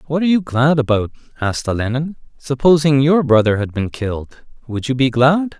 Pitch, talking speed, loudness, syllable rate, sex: 135 Hz, 180 wpm, -16 LUFS, 5.5 syllables/s, male